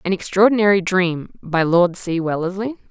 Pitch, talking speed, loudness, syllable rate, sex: 185 Hz, 145 wpm, -18 LUFS, 5.0 syllables/s, female